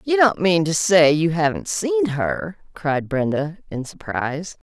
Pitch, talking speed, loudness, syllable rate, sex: 170 Hz, 165 wpm, -20 LUFS, 4.0 syllables/s, female